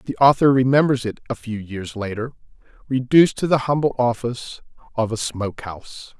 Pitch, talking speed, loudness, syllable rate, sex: 125 Hz, 165 wpm, -20 LUFS, 5.5 syllables/s, male